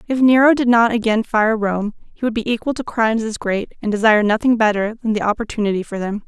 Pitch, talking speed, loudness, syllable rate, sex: 220 Hz, 230 wpm, -17 LUFS, 6.2 syllables/s, female